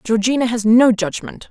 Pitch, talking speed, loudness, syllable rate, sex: 230 Hz, 160 wpm, -15 LUFS, 5.0 syllables/s, female